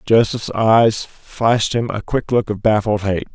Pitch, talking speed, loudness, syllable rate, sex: 110 Hz, 180 wpm, -17 LUFS, 4.2 syllables/s, male